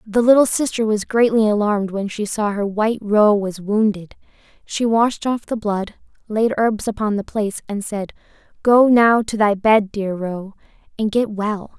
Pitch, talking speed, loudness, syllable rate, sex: 210 Hz, 185 wpm, -18 LUFS, 4.6 syllables/s, female